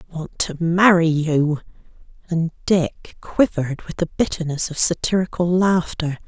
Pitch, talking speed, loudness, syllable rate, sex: 165 Hz, 125 wpm, -20 LUFS, 4.3 syllables/s, female